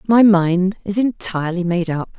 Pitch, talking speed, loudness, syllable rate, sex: 190 Hz, 165 wpm, -17 LUFS, 4.8 syllables/s, female